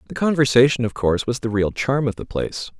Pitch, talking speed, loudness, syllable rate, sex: 120 Hz, 235 wpm, -20 LUFS, 6.4 syllables/s, male